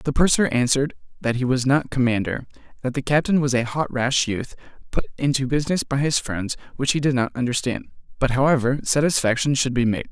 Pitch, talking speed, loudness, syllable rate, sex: 135 Hz, 195 wpm, -22 LUFS, 5.9 syllables/s, male